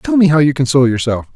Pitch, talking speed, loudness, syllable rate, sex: 145 Hz, 265 wpm, -13 LUFS, 7.1 syllables/s, male